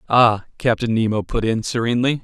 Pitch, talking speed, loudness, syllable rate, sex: 115 Hz, 160 wpm, -19 LUFS, 5.8 syllables/s, male